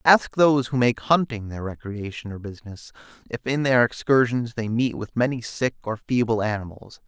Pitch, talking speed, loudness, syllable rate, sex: 120 Hz, 180 wpm, -23 LUFS, 5.1 syllables/s, male